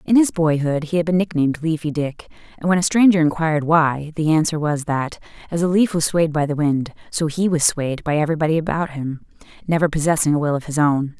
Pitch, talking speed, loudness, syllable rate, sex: 160 Hz, 225 wpm, -19 LUFS, 5.9 syllables/s, female